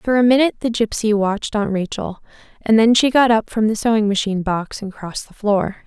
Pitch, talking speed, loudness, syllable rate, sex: 215 Hz, 225 wpm, -18 LUFS, 5.9 syllables/s, female